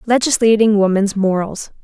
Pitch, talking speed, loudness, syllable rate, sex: 210 Hz, 100 wpm, -15 LUFS, 4.9 syllables/s, female